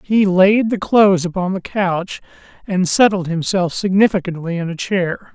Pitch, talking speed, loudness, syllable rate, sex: 190 Hz, 145 wpm, -16 LUFS, 4.6 syllables/s, male